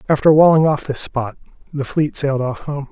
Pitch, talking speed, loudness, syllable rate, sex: 145 Hz, 205 wpm, -17 LUFS, 5.4 syllables/s, male